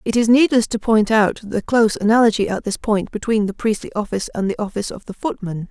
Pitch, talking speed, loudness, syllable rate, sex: 215 Hz, 230 wpm, -18 LUFS, 5.9 syllables/s, female